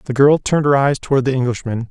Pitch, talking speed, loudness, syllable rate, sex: 130 Hz, 250 wpm, -16 LUFS, 6.9 syllables/s, male